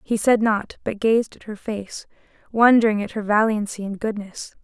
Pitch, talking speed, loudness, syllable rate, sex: 215 Hz, 180 wpm, -21 LUFS, 4.8 syllables/s, female